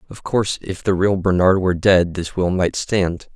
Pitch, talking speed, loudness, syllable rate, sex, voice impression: 95 Hz, 215 wpm, -18 LUFS, 4.8 syllables/s, male, very masculine, adult-like, slightly middle-aged, very thick, relaxed, slightly weak, dark, slightly soft, muffled, slightly fluent, slightly cool, intellectual, very sincere, very calm, mature, slightly friendly, slightly reassuring, very unique, slightly elegant, wild, sweet, very kind, very modest